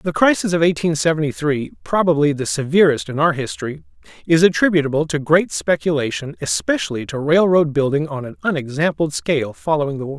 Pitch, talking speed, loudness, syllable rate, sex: 150 Hz, 165 wpm, -18 LUFS, 5.9 syllables/s, male